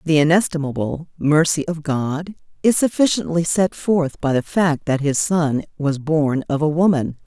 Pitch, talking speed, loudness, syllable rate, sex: 160 Hz, 165 wpm, -19 LUFS, 4.4 syllables/s, female